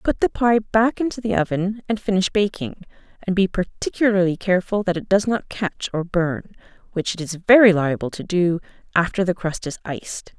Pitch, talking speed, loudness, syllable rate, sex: 190 Hz, 190 wpm, -21 LUFS, 5.1 syllables/s, female